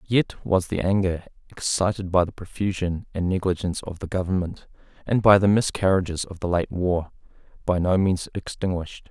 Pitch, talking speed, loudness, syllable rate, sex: 95 Hz, 165 wpm, -24 LUFS, 5.3 syllables/s, male